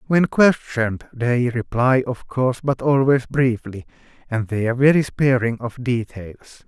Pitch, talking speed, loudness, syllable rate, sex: 125 Hz, 145 wpm, -19 LUFS, 4.6 syllables/s, male